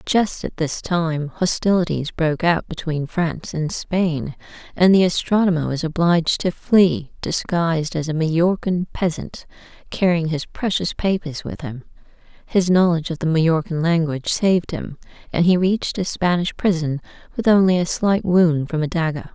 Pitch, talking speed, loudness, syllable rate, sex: 170 Hz, 160 wpm, -20 LUFS, 4.8 syllables/s, female